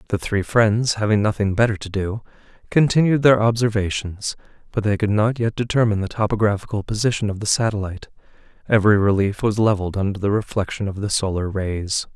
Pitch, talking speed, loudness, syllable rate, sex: 105 Hz, 170 wpm, -20 LUFS, 6.0 syllables/s, male